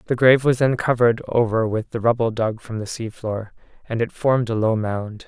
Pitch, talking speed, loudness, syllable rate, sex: 115 Hz, 215 wpm, -21 LUFS, 5.6 syllables/s, male